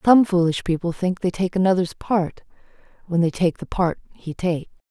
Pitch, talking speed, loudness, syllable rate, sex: 180 Hz, 185 wpm, -22 LUFS, 5.1 syllables/s, female